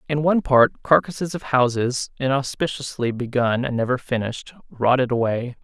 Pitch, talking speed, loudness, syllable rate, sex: 130 Hz, 140 wpm, -21 LUFS, 5.2 syllables/s, male